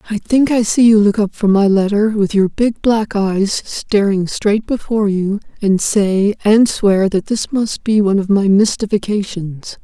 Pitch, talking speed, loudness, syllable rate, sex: 205 Hz, 190 wpm, -15 LUFS, 4.3 syllables/s, female